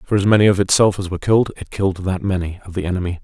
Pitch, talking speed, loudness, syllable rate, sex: 95 Hz, 280 wpm, -18 LUFS, 7.6 syllables/s, male